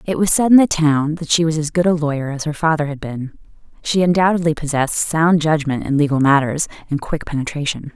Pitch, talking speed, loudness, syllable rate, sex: 155 Hz, 220 wpm, -17 LUFS, 5.9 syllables/s, female